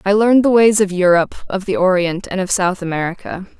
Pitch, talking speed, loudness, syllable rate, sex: 190 Hz, 215 wpm, -15 LUFS, 6.0 syllables/s, female